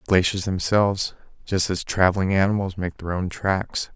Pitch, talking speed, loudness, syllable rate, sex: 95 Hz, 165 wpm, -23 LUFS, 5.0 syllables/s, male